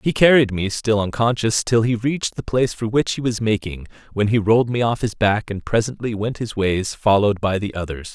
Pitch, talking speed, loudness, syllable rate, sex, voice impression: 110 Hz, 230 wpm, -20 LUFS, 5.5 syllables/s, male, very masculine, very adult-like, slightly old, very thick, tensed, very powerful, bright, hard, very clear, very fluent, very cool, intellectual, sincere, very calm, very mature, very friendly, very reassuring, very unique, elegant, very wild, sweet, very lively, very kind